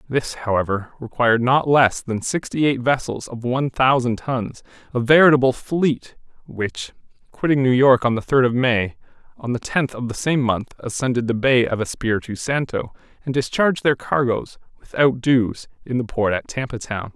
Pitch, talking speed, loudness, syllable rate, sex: 125 Hz, 175 wpm, -20 LUFS, 4.9 syllables/s, male